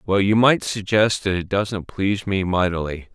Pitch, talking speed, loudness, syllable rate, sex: 100 Hz, 190 wpm, -20 LUFS, 4.7 syllables/s, male